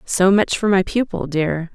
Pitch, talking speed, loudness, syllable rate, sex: 185 Hz, 205 wpm, -18 LUFS, 4.3 syllables/s, female